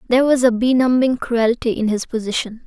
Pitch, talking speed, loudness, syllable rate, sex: 240 Hz, 180 wpm, -17 LUFS, 5.8 syllables/s, female